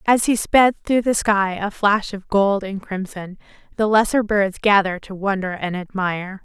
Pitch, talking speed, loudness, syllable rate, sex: 200 Hz, 185 wpm, -19 LUFS, 4.7 syllables/s, female